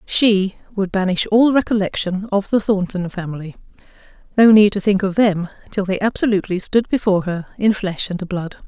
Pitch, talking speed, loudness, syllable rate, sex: 195 Hz, 165 wpm, -18 LUFS, 5.3 syllables/s, female